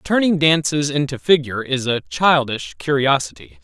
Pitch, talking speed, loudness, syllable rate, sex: 140 Hz, 130 wpm, -18 LUFS, 4.8 syllables/s, male